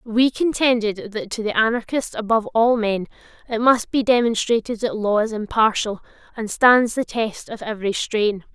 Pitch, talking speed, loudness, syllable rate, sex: 225 Hz, 170 wpm, -20 LUFS, 4.9 syllables/s, female